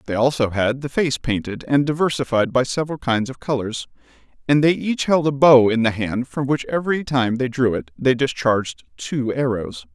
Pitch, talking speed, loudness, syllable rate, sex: 130 Hz, 200 wpm, -20 LUFS, 5.2 syllables/s, male